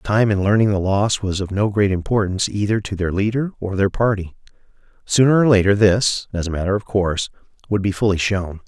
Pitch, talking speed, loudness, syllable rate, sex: 100 Hz, 205 wpm, -19 LUFS, 5.7 syllables/s, male